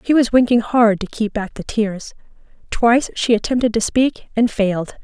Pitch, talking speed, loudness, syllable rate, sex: 225 Hz, 190 wpm, -17 LUFS, 4.9 syllables/s, female